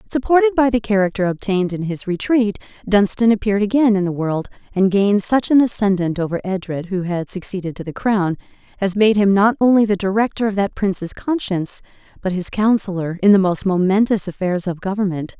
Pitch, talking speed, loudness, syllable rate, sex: 200 Hz, 185 wpm, -18 LUFS, 5.8 syllables/s, female